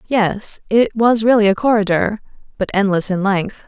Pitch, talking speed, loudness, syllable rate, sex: 210 Hz, 165 wpm, -16 LUFS, 4.5 syllables/s, female